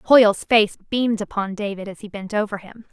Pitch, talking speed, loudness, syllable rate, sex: 210 Hz, 205 wpm, -20 LUFS, 5.3 syllables/s, female